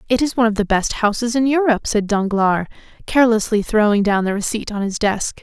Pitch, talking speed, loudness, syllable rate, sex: 220 Hz, 210 wpm, -18 LUFS, 6.0 syllables/s, female